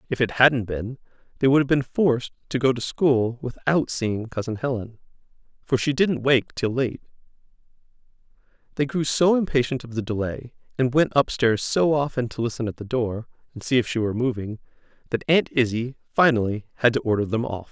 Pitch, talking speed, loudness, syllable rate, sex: 125 Hz, 190 wpm, -23 LUFS, 5.4 syllables/s, male